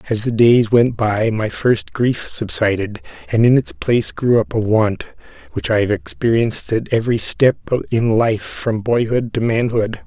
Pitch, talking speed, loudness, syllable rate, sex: 115 Hz, 180 wpm, -17 LUFS, 4.5 syllables/s, male